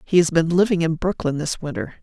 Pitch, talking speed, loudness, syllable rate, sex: 165 Hz, 235 wpm, -20 LUFS, 5.8 syllables/s, female